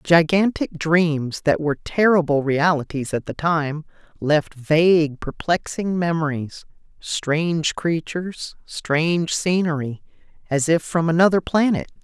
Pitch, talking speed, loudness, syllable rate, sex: 160 Hz, 110 wpm, -20 LUFS, 4.1 syllables/s, female